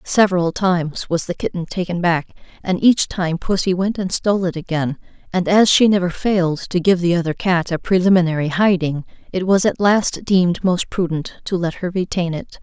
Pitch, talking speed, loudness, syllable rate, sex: 180 Hz, 195 wpm, -18 LUFS, 5.2 syllables/s, female